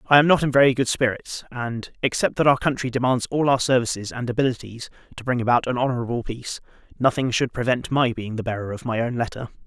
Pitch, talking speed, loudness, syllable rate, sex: 125 Hz, 215 wpm, -22 LUFS, 6.3 syllables/s, male